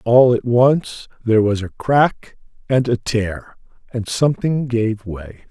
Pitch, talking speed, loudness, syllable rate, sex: 120 Hz, 155 wpm, -18 LUFS, 3.8 syllables/s, male